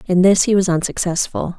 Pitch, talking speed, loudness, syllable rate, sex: 180 Hz, 190 wpm, -16 LUFS, 5.4 syllables/s, female